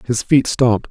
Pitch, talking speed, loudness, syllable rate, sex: 120 Hz, 200 wpm, -15 LUFS, 5.0 syllables/s, male